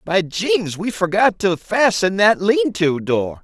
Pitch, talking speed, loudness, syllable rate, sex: 180 Hz, 175 wpm, -17 LUFS, 3.6 syllables/s, male